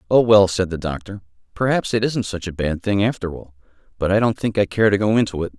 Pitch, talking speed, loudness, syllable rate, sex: 95 Hz, 260 wpm, -19 LUFS, 6.1 syllables/s, male